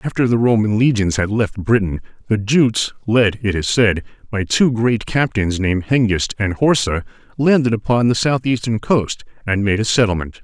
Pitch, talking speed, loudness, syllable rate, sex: 110 Hz, 170 wpm, -17 LUFS, 5.0 syllables/s, male